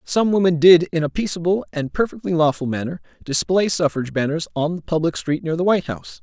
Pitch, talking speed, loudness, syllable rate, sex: 165 Hz, 200 wpm, -20 LUFS, 6.1 syllables/s, male